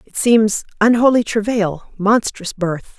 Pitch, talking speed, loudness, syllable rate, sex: 215 Hz, 120 wpm, -16 LUFS, 3.7 syllables/s, female